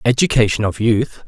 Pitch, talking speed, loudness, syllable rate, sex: 115 Hz, 140 wpm, -16 LUFS, 5.1 syllables/s, male